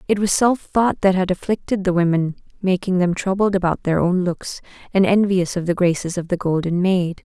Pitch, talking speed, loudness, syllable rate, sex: 185 Hz, 205 wpm, -19 LUFS, 5.3 syllables/s, female